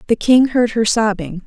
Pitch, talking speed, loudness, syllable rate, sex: 220 Hz, 205 wpm, -15 LUFS, 4.7 syllables/s, female